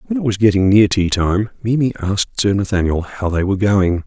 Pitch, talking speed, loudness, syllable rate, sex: 100 Hz, 220 wpm, -16 LUFS, 5.7 syllables/s, male